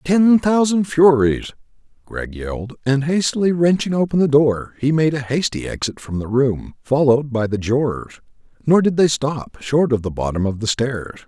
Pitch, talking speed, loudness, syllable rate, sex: 140 Hz, 175 wpm, -18 LUFS, 4.8 syllables/s, male